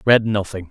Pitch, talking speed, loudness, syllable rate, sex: 105 Hz, 255 wpm, -18 LUFS, 7.0 syllables/s, male